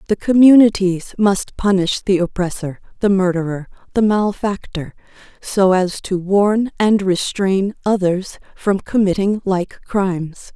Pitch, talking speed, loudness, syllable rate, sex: 195 Hz, 120 wpm, -17 LUFS, 4.1 syllables/s, female